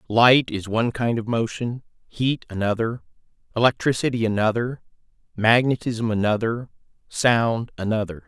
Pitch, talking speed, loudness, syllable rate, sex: 115 Hz, 100 wpm, -22 LUFS, 4.8 syllables/s, male